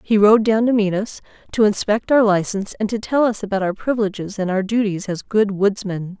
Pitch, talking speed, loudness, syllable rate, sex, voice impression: 205 Hz, 225 wpm, -19 LUFS, 5.6 syllables/s, female, feminine, adult-like, slightly sincere, reassuring, slightly elegant